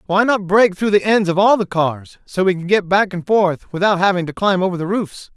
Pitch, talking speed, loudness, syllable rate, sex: 190 Hz, 255 wpm, -16 LUFS, 5.3 syllables/s, male